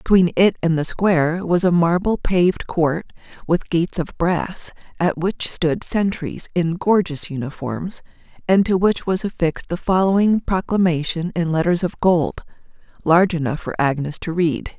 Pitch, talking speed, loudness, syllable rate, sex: 175 Hz, 160 wpm, -19 LUFS, 4.7 syllables/s, female